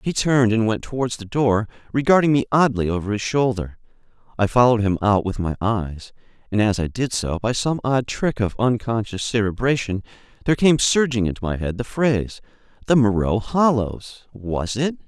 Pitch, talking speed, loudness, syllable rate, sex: 115 Hz, 175 wpm, -20 LUFS, 5.3 syllables/s, male